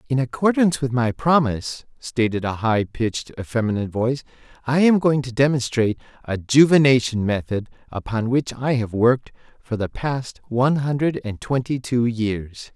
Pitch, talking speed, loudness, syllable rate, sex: 125 Hz, 155 wpm, -21 LUFS, 5.1 syllables/s, male